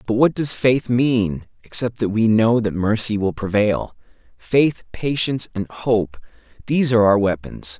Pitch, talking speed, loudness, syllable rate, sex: 110 Hz, 155 wpm, -19 LUFS, 4.5 syllables/s, male